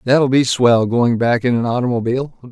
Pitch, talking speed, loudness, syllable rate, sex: 125 Hz, 190 wpm, -16 LUFS, 5.3 syllables/s, male